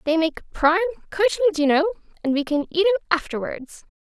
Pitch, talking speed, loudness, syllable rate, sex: 345 Hz, 180 wpm, -22 LUFS, 5.7 syllables/s, female